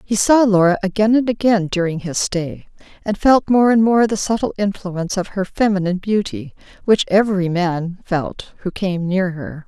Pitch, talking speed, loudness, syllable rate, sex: 195 Hz, 180 wpm, -17 LUFS, 4.9 syllables/s, female